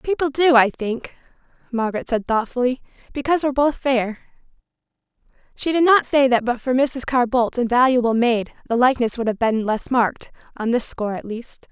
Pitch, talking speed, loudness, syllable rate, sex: 250 Hz, 180 wpm, -19 LUFS, 5.6 syllables/s, female